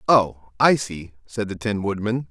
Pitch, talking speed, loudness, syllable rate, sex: 105 Hz, 180 wpm, -22 LUFS, 4.0 syllables/s, male